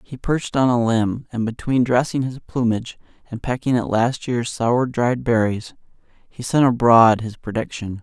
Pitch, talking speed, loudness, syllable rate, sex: 120 Hz, 170 wpm, -20 LUFS, 4.7 syllables/s, male